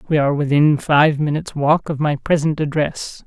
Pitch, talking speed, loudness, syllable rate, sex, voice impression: 150 Hz, 185 wpm, -17 LUFS, 5.2 syllables/s, female, feminine, adult-like, tensed, slightly powerful, slightly dark, fluent, intellectual, calm, reassuring, elegant, modest